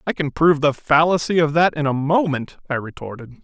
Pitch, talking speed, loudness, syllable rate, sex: 150 Hz, 210 wpm, -19 LUFS, 5.8 syllables/s, male